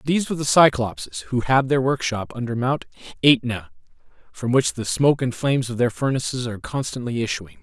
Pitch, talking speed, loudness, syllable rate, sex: 125 Hz, 180 wpm, -21 LUFS, 5.9 syllables/s, male